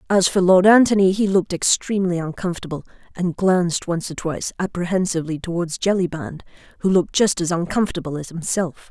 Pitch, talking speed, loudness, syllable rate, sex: 180 Hz, 155 wpm, -20 LUFS, 6.2 syllables/s, female